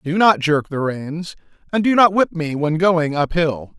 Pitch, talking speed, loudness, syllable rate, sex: 165 Hz, 220 wpm, -18 LUFS, 4.2 syllables/s, male